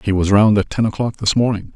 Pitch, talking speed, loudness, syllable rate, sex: 105 Hz, 275 wpm, -16 LUFS, 6.1 syllables/s, male